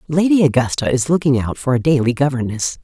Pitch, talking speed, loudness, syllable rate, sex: 135 Hz, 190 wpm, -16 LUFS, 6.0 syllables/s, female